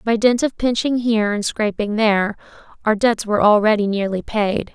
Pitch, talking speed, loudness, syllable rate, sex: 215 Hz, 175 wpm, -18 LUFS, 5.3 syllables/s, female